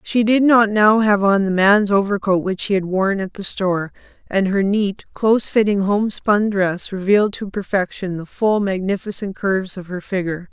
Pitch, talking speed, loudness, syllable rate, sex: 200 Hz, 195 wpm, -18 LUFS, 4.9 syllables/s, female